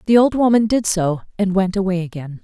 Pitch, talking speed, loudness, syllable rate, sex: 195 Hz, 220 wpm, -17 LUFS, 5.6 syllables/s, female